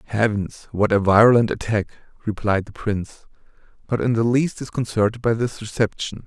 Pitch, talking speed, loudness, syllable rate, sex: 110 Hz, 155 wpm, -21 LUFS, 5.4 syllables/s, male